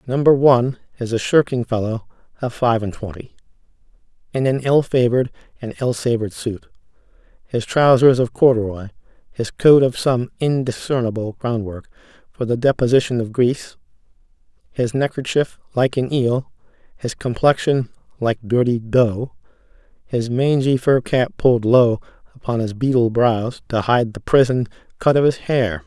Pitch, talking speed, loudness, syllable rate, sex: 125 Hz, 140 wpm, -18 LUFS, 4.8 syllables/s, male